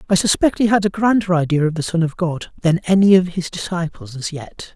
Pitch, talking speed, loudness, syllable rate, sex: 175 Hz, 240 wpm, -18 LUFS, 5.6 syllables/s, male